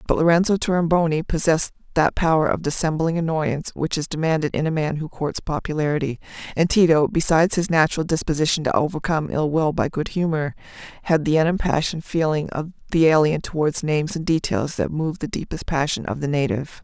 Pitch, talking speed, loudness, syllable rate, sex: 160 Hz, 180 wpm, -21 LUFS, 6.1 syllables/s, female